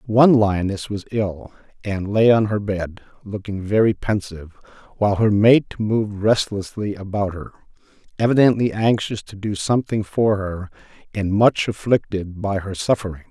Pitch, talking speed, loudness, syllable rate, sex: 105 Hz, 145 wpm, -20 LUFS, 4.8 syllables/s, male